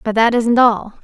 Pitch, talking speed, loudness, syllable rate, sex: 230 Hz, 235 wpm, -14 LUFS, 4.7 syllables/s, female